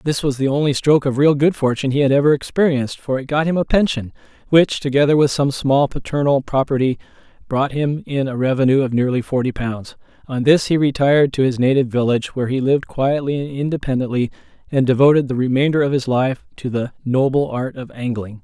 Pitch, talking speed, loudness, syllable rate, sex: 135 Hz, 200 wpm, -18 LUFS, 6.1 syllables/s, male